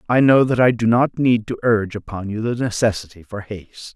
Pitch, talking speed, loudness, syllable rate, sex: 115 Hz, 230 wpm, -18 LUFS, 5.7 syllables/s, male